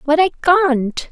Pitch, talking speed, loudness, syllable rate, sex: 315 Hz, 160 wpm, -15 LUFS, 3.5 syllables/s, female